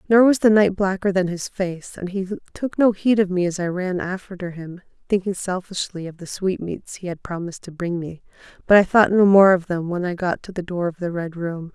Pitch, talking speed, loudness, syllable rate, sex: 185 Hz, 240 wpm, -21 LUFS, 5.3 syllables/s, female